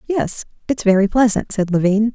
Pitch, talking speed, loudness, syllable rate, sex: 215 Hz, 170 wpm, -17 LUFS, 5.0 syllables/s, female